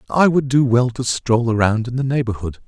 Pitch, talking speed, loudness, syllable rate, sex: 120 Hz, 225 wpm, -18 LUFS, 5.3 syllables/s, male